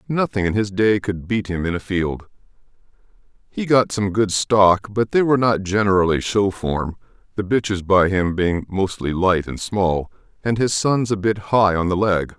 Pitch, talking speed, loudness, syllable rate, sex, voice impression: 100 Hz, 195 wpm, -19 LUFS, 4.6 syllables/s, male, masculine, adult-like, thick, tensed, powerful, slightly hard, clear, cool, calm, friendly, wild, lively